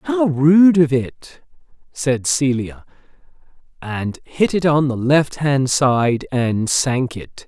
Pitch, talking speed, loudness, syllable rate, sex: 140 Hz, 135 wpm, -17 LUFS, 3.0 syllables/s, male